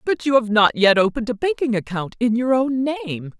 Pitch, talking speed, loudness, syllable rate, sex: 235 Hz, 230 wpm, -19 LUFS, 5.3 syllables/s, female